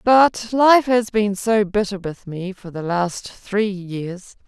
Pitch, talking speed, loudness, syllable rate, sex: 205 Hz, 175 wpm, -19 LUFS, 3.3 syllables/s, female